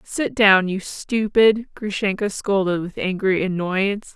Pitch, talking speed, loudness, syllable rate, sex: 200 Hz, 130 wpm, -20 LUFS, 4.0 syllables/s, female